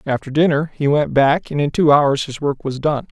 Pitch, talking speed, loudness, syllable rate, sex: 145 Hz, 245 wpm, -17 LUFS, 5.1 syllables/s, male